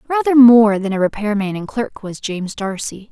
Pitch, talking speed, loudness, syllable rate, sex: 220 Hz, 210 wpm, -16 LUFS, 5.1 syllables/s, female